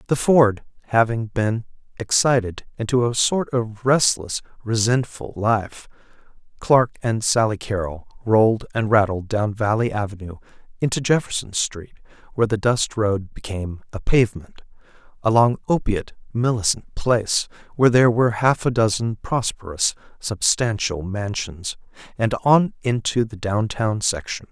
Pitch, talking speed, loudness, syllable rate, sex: 110 Hz, 125 wpm, -21 LUFS, 4.7 syllables/s, male